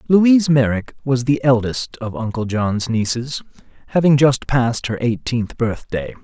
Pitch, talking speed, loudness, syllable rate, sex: 125 Hz, 145 wpm, -18 LUFS, 4.5 syllables/s, male